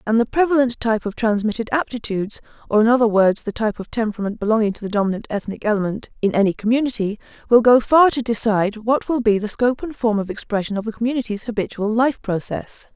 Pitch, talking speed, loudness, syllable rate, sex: 225 Hz, 205 wpm, -19 LUFS, 6.6 syllables/s, female